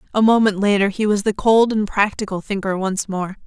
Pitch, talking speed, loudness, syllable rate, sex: 205 Hz, 210 wpm, -18 LUFS, 5.5 syllables/s, female